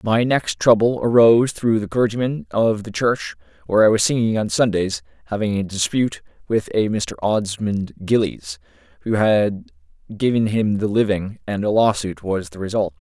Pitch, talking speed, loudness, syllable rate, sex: 105 Hz, 165 wpm, -19 LUFS, 4.9 syllables/s, male